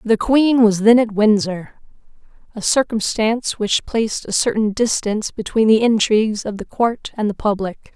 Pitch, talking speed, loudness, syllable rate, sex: 220 Hz, 160 wpm, -17 LUFS, 4.8 syllables/s, female